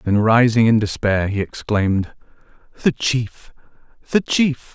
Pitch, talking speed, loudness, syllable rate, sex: 115 Hz, 125 wpm, -18 LUFS, 4.2 syllables/s, male